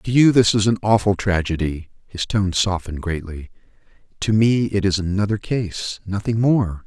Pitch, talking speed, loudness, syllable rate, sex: 100 Hz, 165 wpm, -20 LUFS, 4.8 syllables/s, male